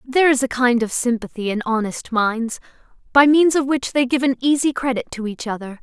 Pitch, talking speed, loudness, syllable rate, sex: 250 Hz, 215 wpm, -19 LUFS, 5.5 syllables/s, female